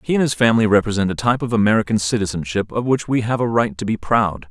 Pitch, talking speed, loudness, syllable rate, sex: 110 Hz, 255 wpm, -18 LUFS, 6.8 syllables/s, male